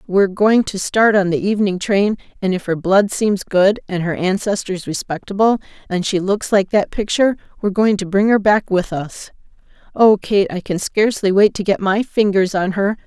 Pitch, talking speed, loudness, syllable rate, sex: 195 Hz, 200 wpm, -17 LUFS, 5.1 syllables/s, female